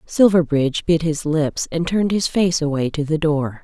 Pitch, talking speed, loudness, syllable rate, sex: 160 Hz, 200 wpm, -19 LUFS, 4.9 syllables/s, female